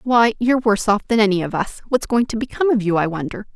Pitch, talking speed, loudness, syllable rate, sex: 220 Hz, 270 wpm, -19 LUFS, 6.7 syllables/s, female